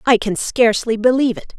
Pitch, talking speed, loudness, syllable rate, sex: 230 Hz, 190 wpm, -16 LUFS, 6.3 syllables/s, female